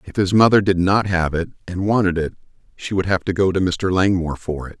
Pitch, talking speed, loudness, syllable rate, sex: 90 Hz, 250 wpm, -19 LUFS, 5.9 syllables/s, male